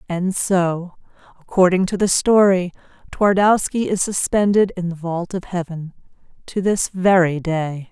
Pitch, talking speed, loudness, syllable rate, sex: 180 Hz, 135 wpm, -18 LUFS, 4.3 syllables/s, female